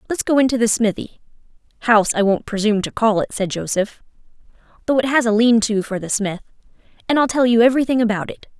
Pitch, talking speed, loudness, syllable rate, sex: 225 Hz, 195 wpm, -18 LUFS, 6.5 syllables/s, female